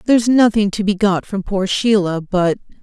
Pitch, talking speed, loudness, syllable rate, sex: 200 Hz, 190 wpm, -16 LUFS, 4.9 syllables/s, female